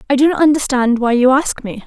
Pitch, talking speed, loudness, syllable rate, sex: 265 Hz, 255 wpm, -14 LUFS, 6.0 syllables/s, female